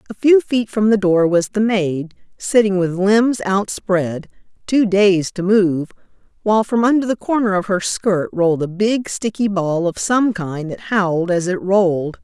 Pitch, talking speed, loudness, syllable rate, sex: 195 Hz, 185 wpm, -17 LUFS, 4.4 syllables/s, female